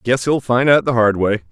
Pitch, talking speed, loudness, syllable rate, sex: 120 Hz, 280 wpm, -15 LUFS, 5.2 syllables/s, male